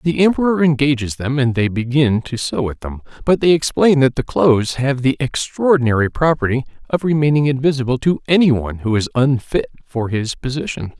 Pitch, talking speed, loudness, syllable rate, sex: 135 Hz, 175 wpm, -17 LUFS, 5.5 syllables/s, male